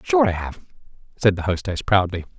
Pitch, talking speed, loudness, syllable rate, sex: 95 Hz, 175 wpm, -21 LUFS, 5.3 syllables/s, male